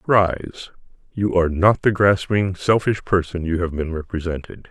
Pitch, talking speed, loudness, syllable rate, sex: 90 Hz, 155 wpm, -20 LUFS, 4.6 syllables/s, male